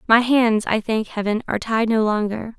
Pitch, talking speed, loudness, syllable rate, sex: 220 Hz, 210 wpm, -20 LUFS, 5.0 syllables/s, female